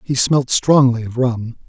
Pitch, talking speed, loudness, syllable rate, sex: 125 Hz, 180 wpm, -16 LUFS, 4.0 syllables/s, male